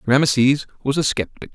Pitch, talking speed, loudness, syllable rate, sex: 130 Hz, 155 wpm, -19 LUFS, 6.7 syllables/s, male